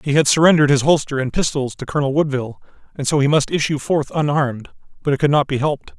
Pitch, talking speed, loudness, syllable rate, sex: 145 Hz, 230 wpm, -18 LUFS, 6.9 syllables/s, male